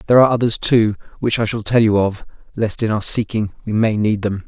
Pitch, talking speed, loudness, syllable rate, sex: 110 Hz, 240 wpm, -17 LUFS, 6.0 syllables/s, male